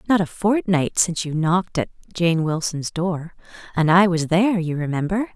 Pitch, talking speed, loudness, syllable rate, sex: 175 Hz, 180 wpm, -21 LUFS, 5.1 syllables/s, female